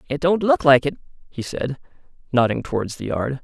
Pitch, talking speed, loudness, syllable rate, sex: 135 Hz, 190 wpm, -20 LUFS, 5.5 syllables/s, male